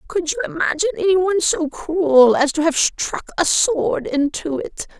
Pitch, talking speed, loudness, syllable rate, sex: 330 Hz, 180 wpm, -18 LUFS, 4.9 syllables/s, female